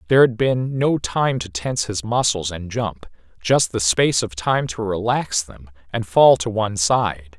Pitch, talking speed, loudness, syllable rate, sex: 110 Hz, 195 wpm, -20 LUFS, 4.5 syllables/s, male